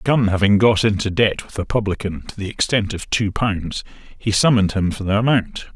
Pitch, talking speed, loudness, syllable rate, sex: 105 Hz, 210 wpm, -19 LUFS, 5.3 syllables/s, male